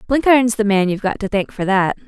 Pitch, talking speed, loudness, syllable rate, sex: 210 Hz, 260 wpm, -17 LUFS, 6.4 syllables/s, female